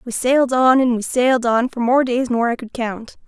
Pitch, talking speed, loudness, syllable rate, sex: 245 Hz, 255 wpm, -17 LUFS, 5.2 syllables/s, female